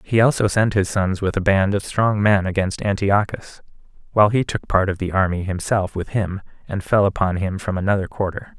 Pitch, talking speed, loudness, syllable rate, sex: 100 Hz, 210 wpm, -20 LUFS, 5.3 syllables/s, male